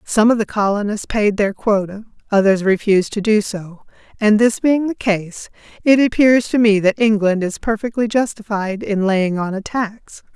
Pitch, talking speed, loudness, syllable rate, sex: 210 Hz, 180 wpm, -17 LUFS, 4.7 syllables/s, female